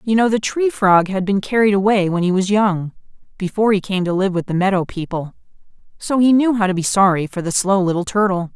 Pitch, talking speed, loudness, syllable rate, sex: 195 Hz, 240 wpm, -17 LUFS, 5.8 syllables/s, female